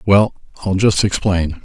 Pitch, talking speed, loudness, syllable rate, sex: 95 Hz, 145 wpm, -16 LUFS, 4.4 syllables/s, male